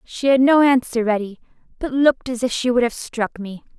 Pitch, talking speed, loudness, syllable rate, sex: 245 Hz, 220 wpm, -18 LUFS, 5.4 syllables/s, female